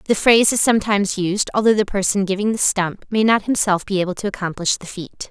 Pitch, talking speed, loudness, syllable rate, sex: 200 Hz, 225 wpm, -18 LUFS, 6.2 syllables/s, female